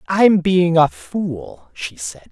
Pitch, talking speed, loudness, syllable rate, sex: 140 Hz, 155 wpm, -17 LUFS, 2.8 syllables/s, male